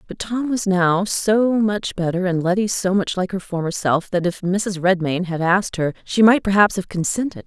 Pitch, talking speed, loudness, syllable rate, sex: 190 Hz, 215 wpm, -19 LUFS, 4.9 syllables/s, female